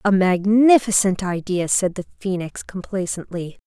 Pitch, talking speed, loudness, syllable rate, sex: 190 Hz, 115 wpm, -20 LUFS, 4.5 syllables/s, female